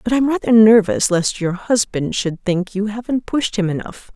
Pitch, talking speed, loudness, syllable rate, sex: 205 Hz, 200 wpm, -17 LUFS, 4.6 syllables/s, female